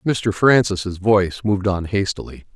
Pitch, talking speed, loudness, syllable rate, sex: 100 Hz, 140 wpm, -18 LUFS, 4.7 syllables/s, male